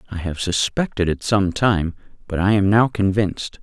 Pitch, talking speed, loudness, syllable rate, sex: 100 Hz, 180 wpm, -20 LUFS, 4.9 syllables/s, male